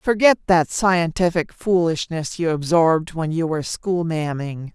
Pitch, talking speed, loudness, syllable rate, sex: 170 Hz, 140 wpm, -20 LUFS, 4.6 syllables/s, female